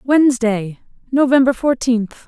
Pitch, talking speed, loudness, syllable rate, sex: 250 Hz, 80 wpm, -16 LUFS, 4.2 syllables/s, female